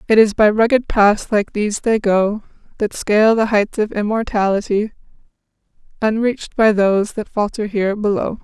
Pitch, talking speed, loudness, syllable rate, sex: 210 Hz, 155 wpm, -17 LUFS, 5.2 syllables/s, female